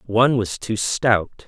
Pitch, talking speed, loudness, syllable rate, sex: 110 Hz, 160 wpm, -20 LUFS, 4.2 syllables/s, male